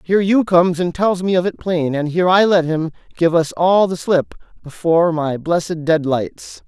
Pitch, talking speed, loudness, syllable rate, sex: 170 Hz, 205 wpm, -16 LUFS, 5.0 syllables/s, male